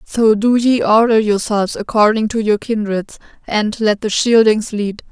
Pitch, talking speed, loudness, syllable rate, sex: 215 Hz, 165 wpm, -15 LUFS, 4.5 syllables/s, female